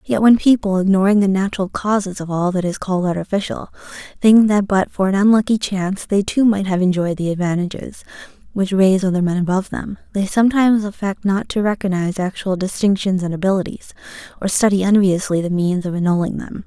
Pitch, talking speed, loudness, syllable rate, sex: 195 Hz, 185 wpm, -17 LUFS, 6.0 syllables/s, female